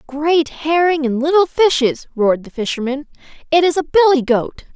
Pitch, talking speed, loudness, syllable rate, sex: 295 Hz, 165 wpm, -16 LUFS, 5.2 syllables/s, female